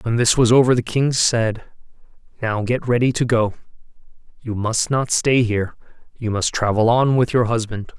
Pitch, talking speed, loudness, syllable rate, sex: 115 Hz, 165 wpm, -19 LUFS, 4.9 syllables/s, male